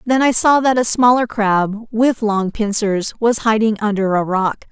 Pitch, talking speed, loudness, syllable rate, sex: 220 Hz, 190 wpm, -16 LUFS, 4.4 syllables/s, female